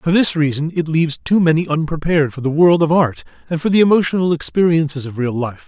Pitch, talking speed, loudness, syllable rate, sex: 160 Hz, 220 wpm, -16 LUFS, 6.2 syllables/s, male